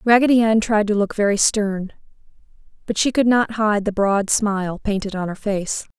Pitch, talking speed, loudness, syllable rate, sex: 210 Hz, 190 wpm, -19 LUFS, 5.0 syllables/s, female